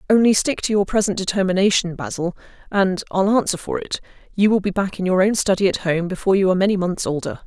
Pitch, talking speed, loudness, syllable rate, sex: 195 Hz, 225 wpm, -19 LUFS, 6.5 syllables/s, female